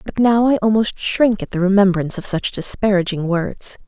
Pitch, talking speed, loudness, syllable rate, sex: 200 Hz, 185 wpm, -17 LUFS, 5.2 syllables/s, female